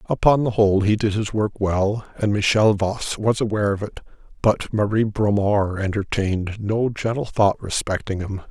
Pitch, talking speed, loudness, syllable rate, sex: 105 Hz, 170 wpm, -21 LUFS, 4.9 syllables/s, male